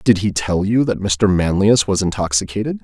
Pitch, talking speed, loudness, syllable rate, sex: 100 Hz, 190 wpm, -17 LUFS, 5.0 syllables/s, male